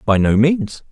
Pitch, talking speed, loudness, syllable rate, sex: 130 Hz, 200 wpm, -16 LUFS, 4.0 syllables/s, male